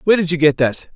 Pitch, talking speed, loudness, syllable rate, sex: 160 Hz, 315 wpm, -16 LUFS, 7.3 syllables/s, male